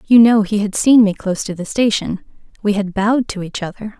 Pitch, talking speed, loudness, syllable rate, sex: 210 Hz, 240 wpm, -16 LUFS, 5.7 syllables/s, female